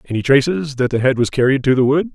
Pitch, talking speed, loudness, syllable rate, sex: 135 Hz, 280 wpm, -16 LUFS, 6.4 syllables/s, male